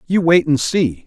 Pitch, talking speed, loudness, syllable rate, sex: 155 Hz, 225 wpm, -16 LUFS, 4.3 syllables/s, male